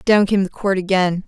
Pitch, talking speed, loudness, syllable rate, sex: 190 Hz, 235 wpm, -18 LUFS, 5.1 syllables/s, female